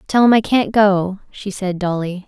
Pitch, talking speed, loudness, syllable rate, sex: 200 Hz, 210 wpm, -16 LUFS, 4.4 syllables/s, female